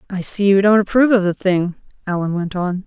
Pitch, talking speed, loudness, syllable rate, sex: 190 Hz, 230 wpm, -17 LUFS, 5.9 syllables/s, female